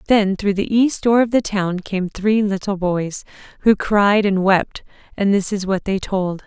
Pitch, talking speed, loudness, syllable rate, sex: 200 Hz, 205 wpm, -18 LUFS, 4.1 syllables/s, female